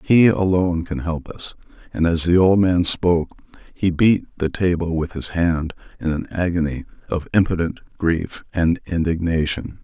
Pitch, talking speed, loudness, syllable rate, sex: 85 Hz, 160 wpm, -20 LUFS, 4.7 syllables/s, male